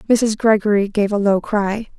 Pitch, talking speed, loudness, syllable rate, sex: 210 Hz, 180 wpm, -17 LUFS, 4.7 syllables/s, female